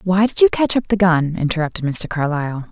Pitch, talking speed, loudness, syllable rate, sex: 170 Hz, 220 wpm, -17 LUFS, 5.8 syllables/s, female